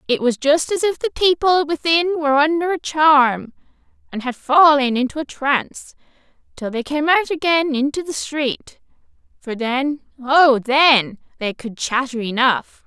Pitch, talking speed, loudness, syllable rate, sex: 285 Hz, 150 wpm, -17 LUFS, 4.3 syllables/s, female